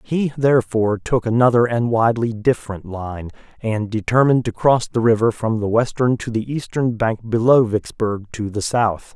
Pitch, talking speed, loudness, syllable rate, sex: 115 Hz, 170 wpm, -19 LUFS, 5.0 syllables/s, male